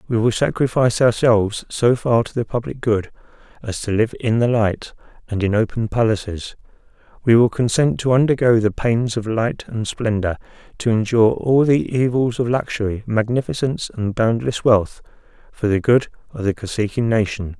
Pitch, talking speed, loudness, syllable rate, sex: 115 Hz, 165 wpm, -19 LUFS, 5.1 syllables/s, male